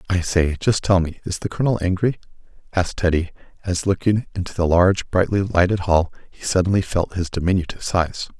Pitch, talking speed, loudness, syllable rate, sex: 90 Hz, 180 wpm, -20 LUFS, 5.9 syllables/s, male